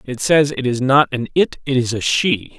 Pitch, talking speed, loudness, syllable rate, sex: 130 Hz, 255 wpm, -17 LUFS, 4.6 syllables/s, male